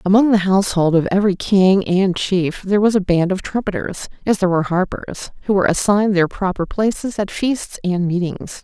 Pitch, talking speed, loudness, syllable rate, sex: 190 Hz, 180 wpm, -17 LUFS, 5.5 syllables/s, female